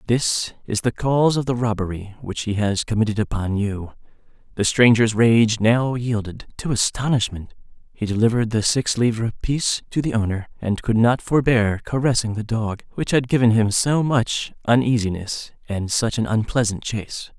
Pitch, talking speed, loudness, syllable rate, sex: 115 Hz, 165 wpm, -20 LUFS, 5.0 syllables/s, male